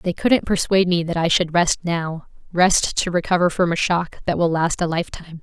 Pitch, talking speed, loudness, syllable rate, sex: 175 Hz, 220 wpm, -19 LUFS, 5.5 syllables/s, female